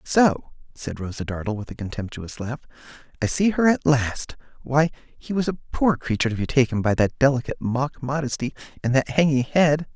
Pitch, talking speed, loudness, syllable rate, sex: 135 Hz, 185 wpm, -23 LUFS, 5.4 syllables/s, male